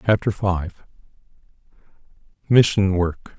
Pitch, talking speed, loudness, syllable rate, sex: 95 Hz, 70 wpm, -20 LUFS, 3.6 syllables/s, male